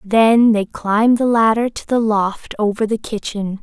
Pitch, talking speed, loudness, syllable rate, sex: 220 Hz, 180 wpm, -16 LUFS, 4.3 syllables/s, female